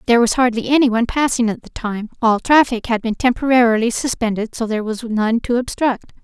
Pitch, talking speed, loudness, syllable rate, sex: 235 Hz, 200 wpm, -17 LUFS, 6.0 syllables/s, female